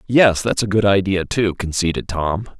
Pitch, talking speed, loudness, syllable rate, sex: 95 Hz, 185 wpm, -18 LUFS, 4.7 syllables/s, male